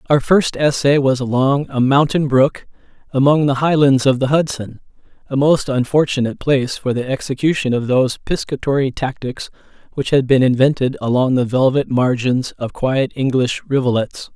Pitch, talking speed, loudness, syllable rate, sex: 135 Hz, 150 wpm, -16 LUFS, 5.1 syllables/s, male